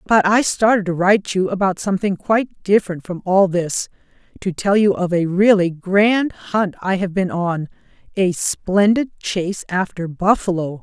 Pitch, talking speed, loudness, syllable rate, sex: 190 Hz, 155 wpm, -18 LUFS, 4.6 syllables/s, female